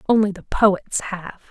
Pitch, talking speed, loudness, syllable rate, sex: 195 Hz, 160 wpm, -20 LUFS, 3.9 syllables/s, female